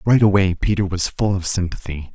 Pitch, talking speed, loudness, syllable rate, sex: 95 Hz, 195 wpm, -19 LUFS, 5.4 syllables/s, male